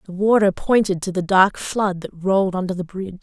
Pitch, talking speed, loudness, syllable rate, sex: 190 Hz, 225 wpm, -19 LUFS, 5.5 syllables/s, female